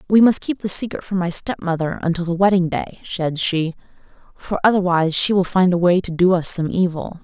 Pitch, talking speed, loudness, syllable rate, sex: 180 Hz, 225 wpm, -19 LUFS, 5.6 syllables/s, female